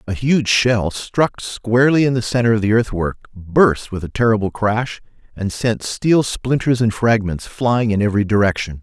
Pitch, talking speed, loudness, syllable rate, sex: 110 Hz, 175 wpm, -17 LUFS, 4.7 syllables/s, male